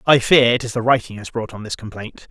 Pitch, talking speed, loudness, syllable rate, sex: 120 Hz, 285 wpm, -18 LUFS, 5.9 syllables/s, male